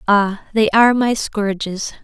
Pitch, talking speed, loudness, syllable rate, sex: 210 Hz, 145 wpm, -17 LUFS, 4.1 syllables/s, female